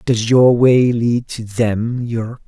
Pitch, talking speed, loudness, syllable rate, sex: 115 Hz, 170 wpm, -15 LUFS, 3.5 syllables/s, male